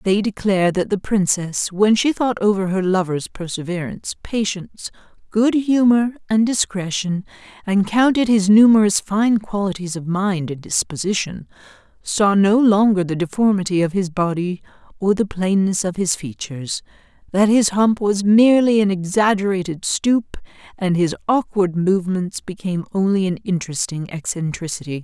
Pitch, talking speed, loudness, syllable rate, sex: 195 Hz, 140 wpm, -18 LUFS, 4.9 syllables/s, female